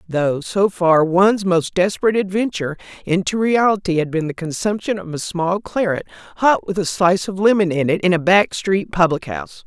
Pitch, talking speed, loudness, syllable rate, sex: 185 Hz, 190 wpm, -18 LUFS, 5.4 syllables/s, female